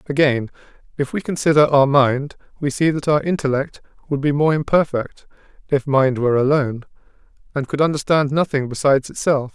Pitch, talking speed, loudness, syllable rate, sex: 140 Hz, 155 wpm, -18 LUFS, 5.6 syllables/s, male